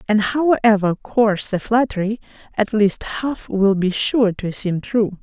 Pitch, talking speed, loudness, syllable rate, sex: 210 Hz, 160 wpm, -19 LUFS, 4.1 syllables/s, female